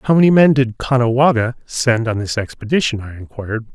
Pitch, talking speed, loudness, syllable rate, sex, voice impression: 120 Hz, 175 wpm, -16 LUFS, 5.6 syllables/s, male, very masculine, middle-aged, very thick, slightly tensed, very powerful, bright, soft, clear, fluent, slightly raspy, cool, very intellectual, refreshing, very sincere, very calm, friendly, very reassuring, unique, slightly elegant, wild, very sweet, lively, kind, slightly intense